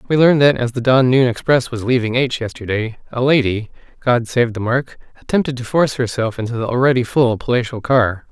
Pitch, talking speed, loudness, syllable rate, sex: 125 Hz, 200 wpm, -17 LUFS, 5.5 syllables/s, male